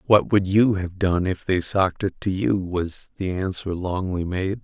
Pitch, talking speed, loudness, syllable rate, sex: 95 Hz, 205 wpm, -23 LUFS, 4.4 syllables/s, male